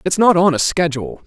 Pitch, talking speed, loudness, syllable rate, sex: 165 Hz, 235 wpm, -15 LUFS, 6.1 syllables/s, male